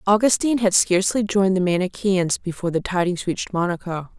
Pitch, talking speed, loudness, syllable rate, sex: 190 Hz, 160 wpm, -20 LUFS, 6.3 syllables/s, female